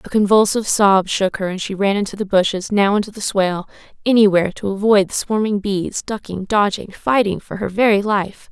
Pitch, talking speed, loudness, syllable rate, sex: 200 Hz, 195 wpm, -17 LUFS, 5.5 syllables/s, female